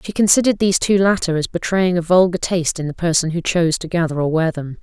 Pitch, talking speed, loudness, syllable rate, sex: 175 Hz, 250 wpm, -17 LUFS, 6.6 syllables/s, female